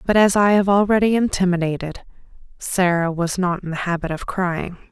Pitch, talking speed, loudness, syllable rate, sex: 185 Hz, 170 wpm, -19 LUFS, 5.0 syllables/s, female